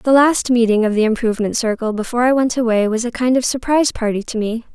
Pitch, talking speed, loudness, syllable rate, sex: 235 Hz, 240 wpm, -17 LUFS, 6.5 syllables/s, female